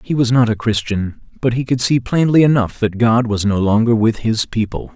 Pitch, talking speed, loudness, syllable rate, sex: 115 Hz, 230 wpm, -16 LUFS, 5.1 syllables/s, male